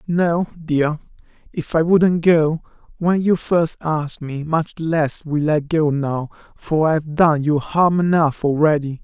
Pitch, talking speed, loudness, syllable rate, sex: 155 Hz, 160 wpm, -18 LUFS, 3.9 syllables/s, male